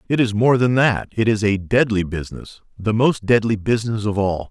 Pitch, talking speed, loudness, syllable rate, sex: 110 Hz, 215 wpm, -19 LUFS, 5.3 syllables/s, male